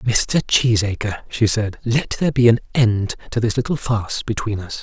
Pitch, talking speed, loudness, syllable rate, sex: 110 Hz, 185 wpm, -19 LUFS, 4.9 syllables/s, male